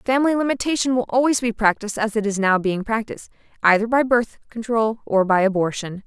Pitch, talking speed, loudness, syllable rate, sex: 225 Hz, 180 wpm, -20 LUFS, 6.0 syllables/s, female